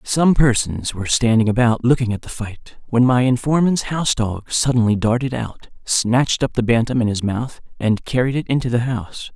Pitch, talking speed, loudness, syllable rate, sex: 120 Hz, 190 wpm, -18 LUFS, 5.2 syllables/s, male